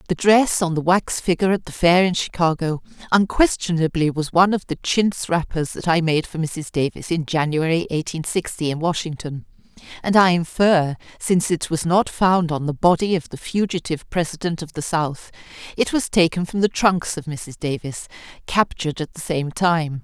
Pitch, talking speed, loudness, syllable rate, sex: 170 Hz, 185 wpm, -20 LUFS, 5.1 syllables/s, female